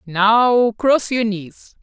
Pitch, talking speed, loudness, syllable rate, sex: 220 Hz, 130 wpm, -16 LUFS, 2.5 syllables/s, female